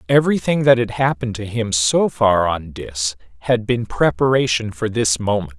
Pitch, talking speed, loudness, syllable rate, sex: 110 Hz, 170 wpm, -18 LUFS, 4.9 syllables/s, male